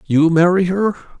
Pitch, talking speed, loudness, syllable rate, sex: 175 Hz, 150 wpm, -15 LUFS, 4.6 syllables/s, male